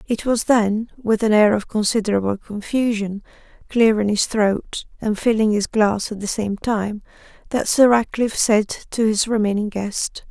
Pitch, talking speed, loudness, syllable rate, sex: 215 Hz, 165 wpm, -19 LUFS, 4.5 syllables/s, female